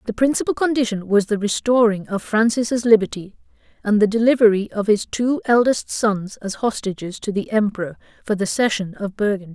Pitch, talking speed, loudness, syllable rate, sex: 215 Hz, 170 wpm, -19 LUFS, 5.5 syllables/s, female